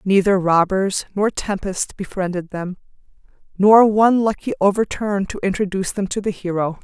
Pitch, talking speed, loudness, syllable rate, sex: 195 Hz, 140 wpm, -19 LUFS, 5.1 syllables/s, female